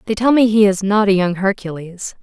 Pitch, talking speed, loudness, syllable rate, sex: 200 Hz, 245 wpm, -15 LUFS, 5.5 syllables/s, female